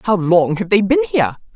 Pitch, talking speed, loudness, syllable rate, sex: 195 Hz, 230 wpm, -15 LUFS, 5.9 syllables/s, female